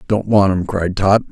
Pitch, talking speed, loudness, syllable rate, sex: 100 Hz, 230 wpm, -16 LUFS, 4.6 syllables/s, male